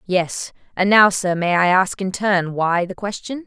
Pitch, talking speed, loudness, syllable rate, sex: 190 Hz, 210 wpm, -18 LUFS, 4.2 syllables/s, female